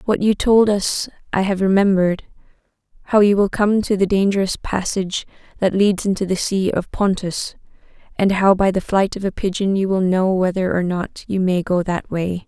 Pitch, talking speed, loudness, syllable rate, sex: 190 Hz, 190 wpm, -18 LUFS, 5.1 syllables/s, female